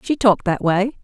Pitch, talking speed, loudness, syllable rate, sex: 210 Hz, 235 wpm, -18 LUFS, 5.4 syllables/s, female